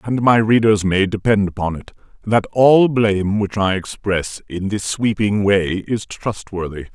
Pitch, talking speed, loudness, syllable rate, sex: 100 Hz, 165 wpm, -17 LUFS, 4.3 syllables/s, male